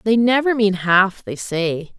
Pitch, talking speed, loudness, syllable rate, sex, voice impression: 205 Hz, 180 wpm, -17 LUFS, 3.8 syllables/s, female, feminine, slightly gender-neutral, slightly young, adult-like, thin, tensed, slightly powerful, slightly bright, hard, clear, fluent, slightly raspy, slightly cool, intellectual, slightly refreshing, sincere, slightly calm, friendly, reassuring, slightly elegant, slightly sweet, lively, slightly strict, slightly intense, slightly sharp